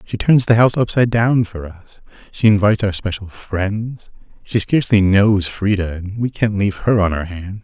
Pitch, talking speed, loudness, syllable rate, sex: 105 Hz, 190 wpm, -17 LUFS, 5.1 syllables/s, male